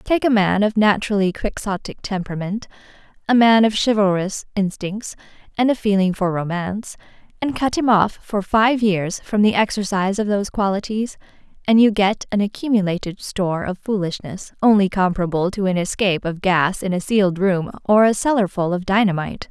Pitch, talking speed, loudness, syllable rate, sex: 200 Hz, 165 wpm, -19 LUFS, 5.5 syllables/s, female